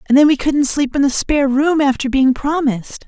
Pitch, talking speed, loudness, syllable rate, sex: 275 Hz, 235 wpm, -15 LUFS, 5.5 syllables/s, female